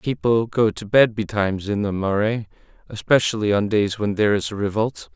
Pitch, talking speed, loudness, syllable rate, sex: 105 Hz, 185 wpm, -20 LUFS, 5.4 syllables/s, male